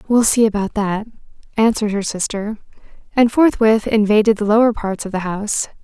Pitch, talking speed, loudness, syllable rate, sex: 215 Hz, 165 wpm, -17 LUFS, 5.6 syllables/s, female